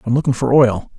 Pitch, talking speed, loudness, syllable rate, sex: 125 Hz, 245 wpm, -15 LUFS, 6.3 syllables/s, male